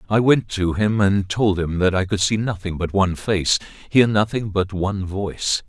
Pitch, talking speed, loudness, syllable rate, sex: 100 Hz, 210 wpm, -20 LUFS, 4.8 syllables/s, male